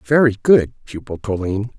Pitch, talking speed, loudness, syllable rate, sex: 110 Hz, 135 wpm, -17 LUFS, 5.6 syllables/s, male